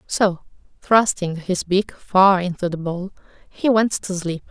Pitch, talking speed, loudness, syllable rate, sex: 185 Hz, 160 wpm, -20 LUFS, 3.8 syllables/s, female